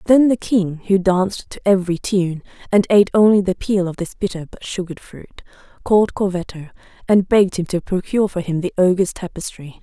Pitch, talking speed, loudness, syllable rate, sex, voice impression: 190 Hz, 190 wpm, -18 LUFS, 5.8 syllables/s, female, feminine, adult-like, slightly relaxed, slightly powerful, soft, fluent, intellectual, calm, friendly, reassuring, elegant, modest